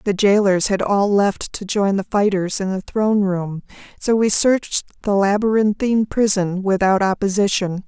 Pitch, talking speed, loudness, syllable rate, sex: 200 Hz, 160 wpm, -18 LUFS, 4.7 syllables/s, female